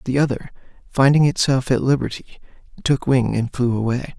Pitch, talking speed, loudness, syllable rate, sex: 130 Hz, 160 wpm, -19 LUFS, 5.5 syllables/s, male